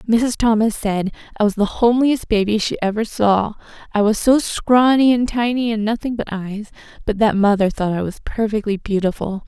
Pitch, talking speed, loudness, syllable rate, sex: 215 Hz, 185 wpm, -18 LUFS, 5.2 syllables/s, female